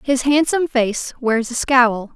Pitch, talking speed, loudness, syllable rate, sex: 255 Hz, 165 wpm, -17 LUFS, 4.0 syllables/s, female